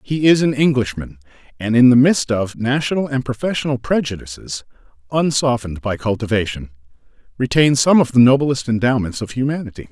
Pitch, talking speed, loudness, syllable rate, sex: 125 Hz, 145 wpm, -17 LUFS, 5.7 syllables/s, male